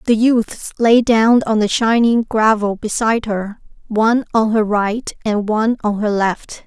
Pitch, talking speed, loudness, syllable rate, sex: 220 Hz, 170 wpm, -16 LUFS, 4.2 syllables/s, female